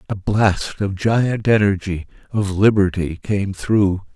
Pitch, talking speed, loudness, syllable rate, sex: 100 Hz, 130 wpm, -19 LUFS, 3.6 syllables/s, male